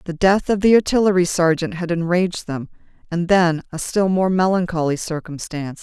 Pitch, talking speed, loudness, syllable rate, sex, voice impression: 175 Hz, 165 wpm, -19 LUFS, 5.4 syllables/s, female, feminine, middle-aged, tensed, powerful, clear, fluent, intellectual, elegant, lively, slightly strict, sharp